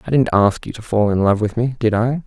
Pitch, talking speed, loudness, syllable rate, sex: 115 Hz, 320 wpm, -17 LUFS, 5.9 syllables/s, male